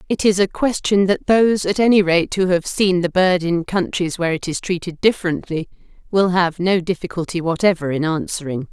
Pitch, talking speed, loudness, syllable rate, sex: 180 Hz, 195 wpm, -18 LUFS, 5.4 syllables/s, female